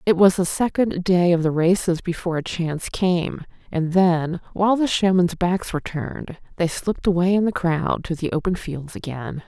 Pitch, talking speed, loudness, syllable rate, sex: 175 Hz, 195 wpm, -21 LUFS, 5.0 syllables/s, female